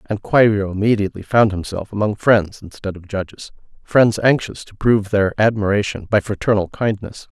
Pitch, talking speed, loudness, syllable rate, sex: 105 Hz, 145 wpm, -18 LUFS, 5.4 syllables/s, male